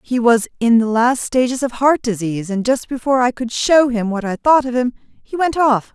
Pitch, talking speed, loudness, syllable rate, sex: 245 Hz, 240 wpm, -16 LUFS, 5.3 syllables/s, female